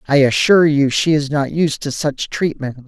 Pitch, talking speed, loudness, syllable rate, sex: 145 Hz, 210 wpm, -16 LUFS, 4.9 syllables/s, male